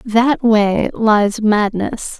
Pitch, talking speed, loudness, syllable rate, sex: 215 Hz, 110 wpm, -15 LUFS, 2.4 syllables/s, female